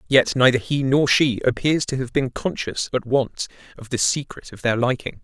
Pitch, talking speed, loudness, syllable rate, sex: 130 Hz, 205 wpm, -21 LUFS, 5.0 syllables/s, male